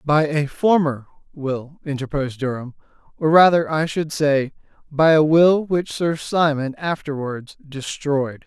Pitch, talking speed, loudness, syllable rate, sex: 150 Hz, 135 wpm, -19 LUFS, 4.0 syllables/s, male